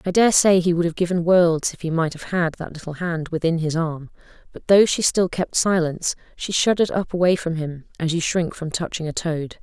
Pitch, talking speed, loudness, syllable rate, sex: 170 Hz, 235 wpm, -21 LUFS, 5.4 syllables/s, female